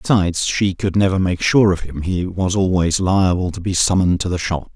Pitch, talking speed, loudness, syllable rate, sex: 90 Hz, 225 wpm, -18 LUFS, 5.3 syllables/s, male